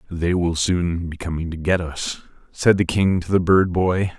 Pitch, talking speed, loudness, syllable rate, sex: 85 Hz, 215 wpm, -20 LUFS, 4.4 syllables/s, male